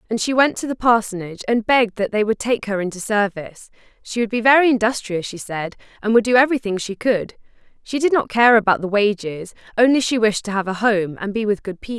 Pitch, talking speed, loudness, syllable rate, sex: 220 Hz, 235 wpm, -19 LUFS, 6.1 syllables/s, female